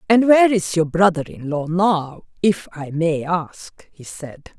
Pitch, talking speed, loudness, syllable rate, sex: 175 Hz, 185 wpm, -18 LUFS, 3.9 syllables/s, female